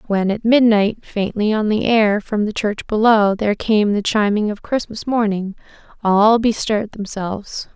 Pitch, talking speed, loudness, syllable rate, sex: 210 Hz, 160 wpm, -17 LUFS, 4.5 syllables/s, female